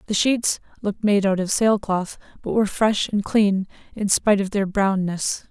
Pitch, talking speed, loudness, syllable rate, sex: 200 Hz, 195 wpm, -21 LUFS, 4.8 syllables/s, female